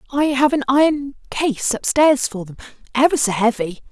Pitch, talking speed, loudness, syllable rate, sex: 260 Hz, 170 wpm, -18 LUFS, 4.8 syllables/s, female